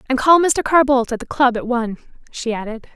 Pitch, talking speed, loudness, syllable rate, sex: 255 Hz, 245 wpm, -17 LUFS, 5.9 syllables/s, female